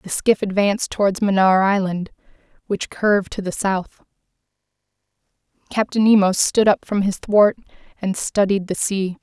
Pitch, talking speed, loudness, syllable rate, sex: 200 Hz, 145 wpm, -19 LUFS, 4.7 syllables/s, female